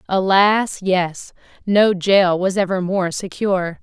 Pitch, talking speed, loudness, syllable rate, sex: 190 Hz, 125 wpm, -17 LUFS, 3.7 syllables/s, female